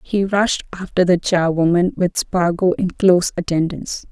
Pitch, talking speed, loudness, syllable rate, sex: 180 Hz, 145 wpm, -18 LUFS, 4.8 syllables/s, female